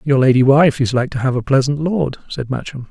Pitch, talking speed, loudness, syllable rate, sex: 135 Hz, 250 wpm, -16 LUFS, 5.5 syllables/s, male